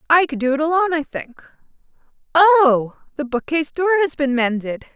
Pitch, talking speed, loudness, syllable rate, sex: 300 Hz, 170 wpm, -18 LUFS, 5.4 syllables/s, female